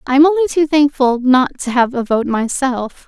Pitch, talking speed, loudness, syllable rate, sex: 270 Hz, 215 wpm, -15 LUFS, 5.1 syllables/s, female